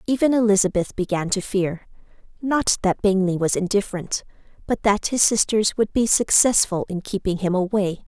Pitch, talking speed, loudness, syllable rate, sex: 200 Hz, 140 wpm, -21 LUFS, 5.2 syllables/s, female